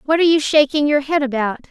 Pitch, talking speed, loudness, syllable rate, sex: 290 Hz, 245 wpm, -16 LUFS, 6.8 syllables/s, female